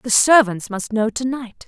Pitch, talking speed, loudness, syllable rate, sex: 230 Hz, 215 wpm, -17 LUFS, 4.3 syllables/s, female